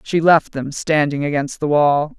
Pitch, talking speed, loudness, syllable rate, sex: 150 Hz, 190 wpm, -17 LUFS, 4.3 syllables/s, female